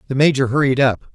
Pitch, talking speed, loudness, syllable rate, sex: 135 Hz, 210 wpm, -16 LUFS, 7.3 syllables/s, male